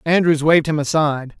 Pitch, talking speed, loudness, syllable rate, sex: 155 Hz, 170 wpm, -17 LUFS, 6.4 syllables/s, male